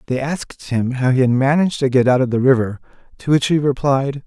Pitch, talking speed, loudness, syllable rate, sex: 130 Hz, 240 wpm, -17 LUFS, 5.9 syllables/s, male